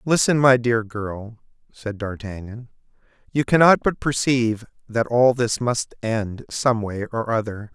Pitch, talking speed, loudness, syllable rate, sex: 115 Hz, 145 wpm, -21 LUFS, 4.1 syllables/s, male